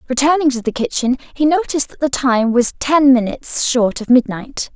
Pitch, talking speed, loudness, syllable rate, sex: 260 Hz, 190 wpm, -16 LUFS, 5.3 syllables/s, female